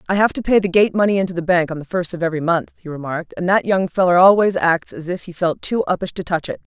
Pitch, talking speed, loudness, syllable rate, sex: 180 Hz, 295 wpm, -18 LUFS, 6.7 syllables/s, female